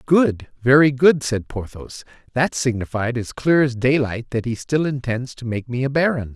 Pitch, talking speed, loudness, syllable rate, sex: 125 Hz, 190 wpm, -20 LUFS, 4.6 syllables/s, male